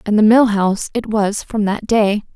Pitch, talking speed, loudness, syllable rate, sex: 210 Hz, 230 wpm, -16 LUFS, 4.7 syllables/s, female